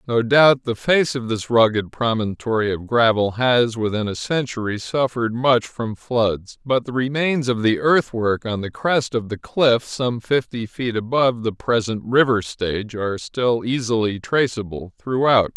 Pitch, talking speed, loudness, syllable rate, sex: 115 Hz, 165 wpm, -20 LUFS, 4.4 syllables/s, male